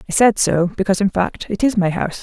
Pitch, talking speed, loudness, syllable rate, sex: 195 Hz, 270 wpm, -17 LUFS, 6.6 syllables/s, female